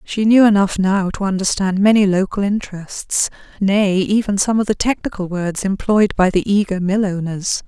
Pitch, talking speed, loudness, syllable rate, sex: 195 Hz, 165 wpm, -17 LUFS, 4.8 syllables/s, female